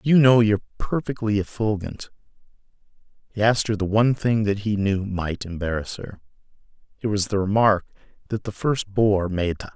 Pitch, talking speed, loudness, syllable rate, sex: 105 Hz, 170 wpm, -22 LUFS, 5.4 syllables/s, male